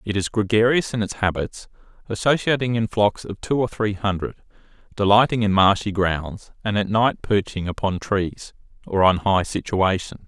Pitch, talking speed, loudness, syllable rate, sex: 105 Hz, 165 wpm, -21 LUFS, 4.8 syllables/s, male